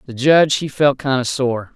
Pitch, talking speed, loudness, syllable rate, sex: 135 Hz, 240 wpm, -16 LUFS, 5.0 syllables/s, male